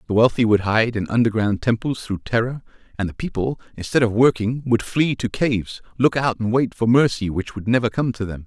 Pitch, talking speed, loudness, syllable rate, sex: 115 Hz, 220 wpm, -20 LUFS, 5.5 syllables/s, male